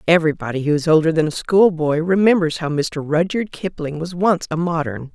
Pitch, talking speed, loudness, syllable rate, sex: 165 Hz, 185 wpm, -18 LUFS, 5.4 syllables/s, female